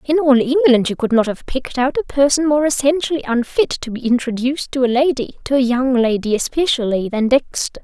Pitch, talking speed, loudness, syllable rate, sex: 260 Hz, 190 wpm, -17 LUFS, 5.8 syllables/s, female